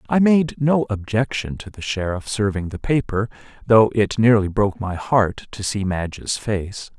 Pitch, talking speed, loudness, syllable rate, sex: 105 Hz, 170 wpm, -20 LUFS, 4.5 syllables/s, male